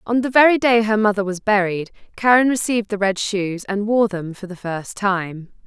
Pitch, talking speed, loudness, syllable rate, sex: 205 Hz, 210 wpm, -18 LUFS, 5.0 syllables/s, female